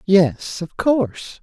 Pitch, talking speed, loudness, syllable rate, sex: 185 Hz, 125 wpm, -19 LUFS, 3.0 syllables/s, male